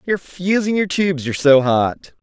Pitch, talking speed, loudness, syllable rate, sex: 165 Hz, 190 wpm, -17 LUFS, 5.4 syllables/s, male